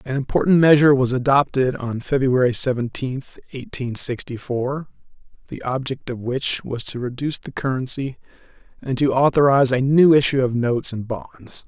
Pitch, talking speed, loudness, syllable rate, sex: 130 Hz, 155 wpm, -20 LUFS, 5.1 syllables/s, male